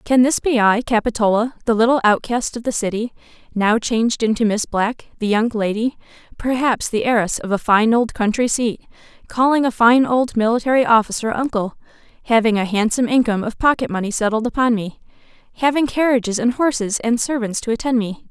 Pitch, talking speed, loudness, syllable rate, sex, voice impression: 230 Hz, 175 wpm, -18 LUFS, 5.6 syllables/s, female, feminine, tensed, slightly powerful, slightly hard, clear, fluent, intellectual, calm, elegant, sharp